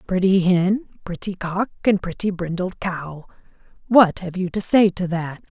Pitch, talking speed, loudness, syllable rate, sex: 185 Hz, 160 wpm, -20 LUFS, 4.3 syllables/s, female